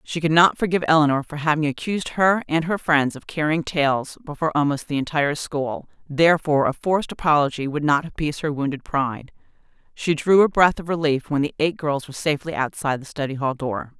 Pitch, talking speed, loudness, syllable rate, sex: 150 Hz, 200 wpm, -21 LUFS, 6.1 syllables/s, female